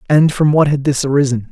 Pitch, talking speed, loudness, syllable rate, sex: 140 Hz, 240 wpm, -14 LUFS, 6.0 syllables/s, male